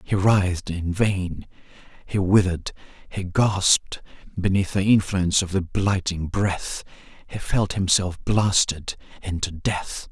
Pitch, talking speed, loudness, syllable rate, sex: 95 Hz, 105 wpm, -22 LUFS, 4.1 syllables/s, male